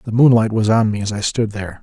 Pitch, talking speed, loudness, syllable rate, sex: 110 Hz, 295 wpm, -16 LUFS, 6.4 syllables/s, male